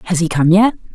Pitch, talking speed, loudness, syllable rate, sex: 180 Hz, 255 wpm, -14 LUFS, 7.1 syllables/s, female